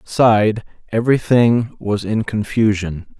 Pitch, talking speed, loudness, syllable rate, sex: 110 Hz, 95 wpm, -17 LUFS, 4.3 syllables/s, male